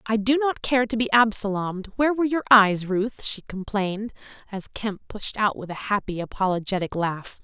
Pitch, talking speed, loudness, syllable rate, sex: 210 Hz, 185 wpm, -23 LUFS, 5.2 syllables/s, female